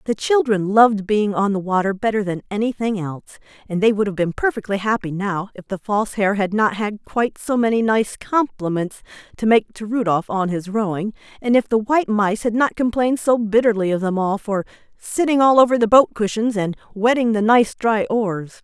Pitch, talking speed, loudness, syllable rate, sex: 215 Hz, 205 wpm, -19 LUFS, 5.5 syllables/s, female